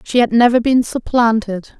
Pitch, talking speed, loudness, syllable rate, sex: 230 Hz, 170 wpm, -14 LUFS, 4.7 syllables/s, female